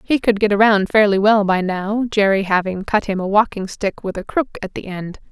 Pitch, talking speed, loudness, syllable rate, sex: 200 Hz, 235 wpm, -17 LUFS, 5.1 syllables/s, female